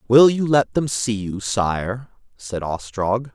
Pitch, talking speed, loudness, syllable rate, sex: 115 Hz, 160 wpm, -20 LUFS, 3.5 syllables/s, male